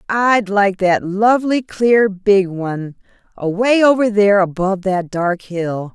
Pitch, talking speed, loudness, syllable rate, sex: 200 Hz, 140 wpm, -16 LUFS, 4.1 syllables/s, female